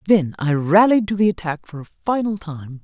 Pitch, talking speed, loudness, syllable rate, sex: 180 Hz, 210 wpm, -19 LUFS, 5.0 syllables/s, female